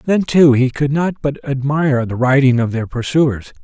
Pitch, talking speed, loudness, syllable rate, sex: 135 Hz, 200 wpm, -15 LUFS, 4.6 syllables/s, male